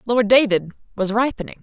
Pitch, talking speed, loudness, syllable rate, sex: 220 Hz, 150 wpm, -18 LUFS, 5.5 syllables/s, female